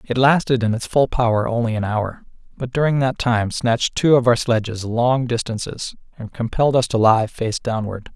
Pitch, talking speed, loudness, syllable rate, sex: 120 Hz, 200 wpm, -19 LUFS, 5.1 syllables/s, male